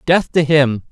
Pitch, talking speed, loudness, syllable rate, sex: 145 Hz, 195 wpm, -14 LUFS, 4.0 syllables/s, male